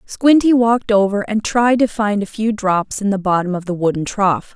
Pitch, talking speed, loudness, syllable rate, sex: 210 Hz, 225 wpm, -16 LUFS, 5.0 syllables/s, female